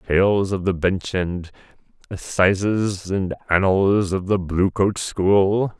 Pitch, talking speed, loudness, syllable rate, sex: 95 Hz, 125 wpm, -20 LUFS, 3.3 syllables/s, male